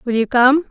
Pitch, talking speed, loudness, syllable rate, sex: 255 Hz, 255 wpm, -14 LUFS, 5.2 syllables/s, female